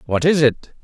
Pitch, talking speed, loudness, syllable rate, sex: 140 Hz, 215 wpm, -17 LUFS, 4.8 syllables/s, male